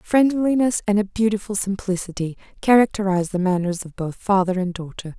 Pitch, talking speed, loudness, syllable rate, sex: 195 Hz, 150 wpm, -21 LUFS, 5.6 syllables/s, female